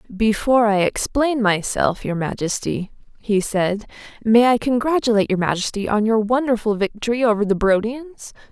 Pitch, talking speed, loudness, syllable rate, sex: 220 Hz, 140 wpm, -19 LUFS, 5.2 syllables/s, female